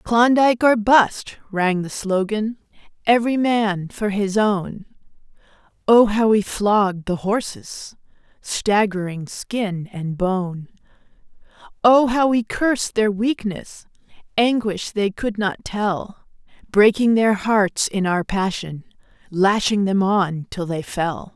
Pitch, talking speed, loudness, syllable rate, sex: 205 Hz, 125 wpm, -19 LUFS, 3.5 syllables/s, female